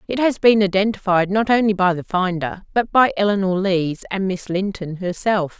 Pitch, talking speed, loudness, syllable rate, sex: 195 Hz, 180 wpm, -19 LUFS, 5.0 syllables/s, female